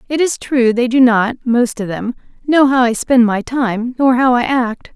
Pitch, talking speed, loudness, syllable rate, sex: 245 Hz, 230 wpm, -14 LUFS, 4.4 syllables/s, female